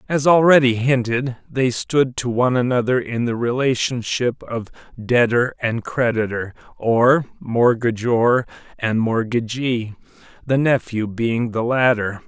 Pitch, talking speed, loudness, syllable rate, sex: 120 Hz, 110 wpm, -19 LUFS, 4.0 syllables/s, male